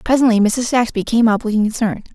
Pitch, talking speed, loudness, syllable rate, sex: 225 Hz, 195 wpm, -16 LUFS, 6.7 syllables/s, female